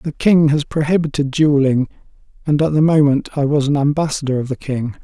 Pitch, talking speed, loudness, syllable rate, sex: 145 Hz, 190 wpm, -16 LUFS, 5.6 syllables/s, male